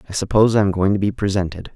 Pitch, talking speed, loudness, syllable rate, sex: 100 Hz, 275 wpm, -18 LUFS, 7.7 syllables/s, male